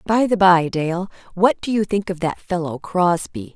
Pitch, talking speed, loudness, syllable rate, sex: 180 Hz, 205 wpm, -19 LUFS, 4.4 syllables/s, female